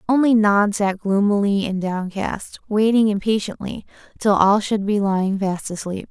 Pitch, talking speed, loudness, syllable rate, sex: 205 Hz, 145 wpm, -19 LUFS, 4.4 syllables/s, female